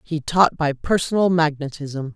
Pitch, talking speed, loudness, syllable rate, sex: 155 Hz, 140 wpm, -20 LUFS, 4.4 syllables/s, female